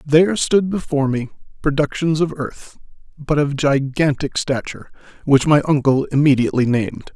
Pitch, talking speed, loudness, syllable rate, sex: 145 Hz, 135 wpm, -18 LUFS, 5.3 syllables/s, male